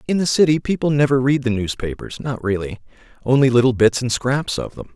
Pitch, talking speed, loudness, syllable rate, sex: 130 Hz, 205 wpm, -18 LUFS, 5.8 syllables/s, male